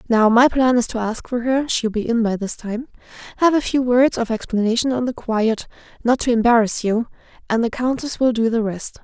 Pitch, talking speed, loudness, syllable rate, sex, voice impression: 235 Hz, 225 wpm, -19 LUFS, 4.9 syllables/s, female, feminine, slightly adult-like, soft, cute, slightly refreshing, calm, friendly, kind, slightly light